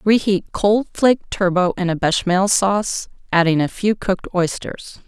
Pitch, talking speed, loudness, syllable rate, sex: 190 Hz, 155 wpm, -18 LUFS, 4.9 syllables/s, female